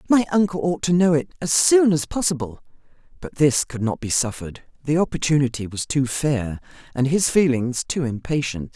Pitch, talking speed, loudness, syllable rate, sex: 145 Hz, 180 wpm, -21 LUFS, 5.2 syllables/s, female